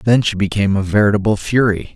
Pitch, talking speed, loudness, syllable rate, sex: 105 Hz, 185 wpm, -16 LUFS, 6.3 syllables/s, male